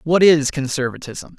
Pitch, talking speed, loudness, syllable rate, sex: 155 Hz, 130 wpm, -17 LUFS, 4.7 syllables/s, male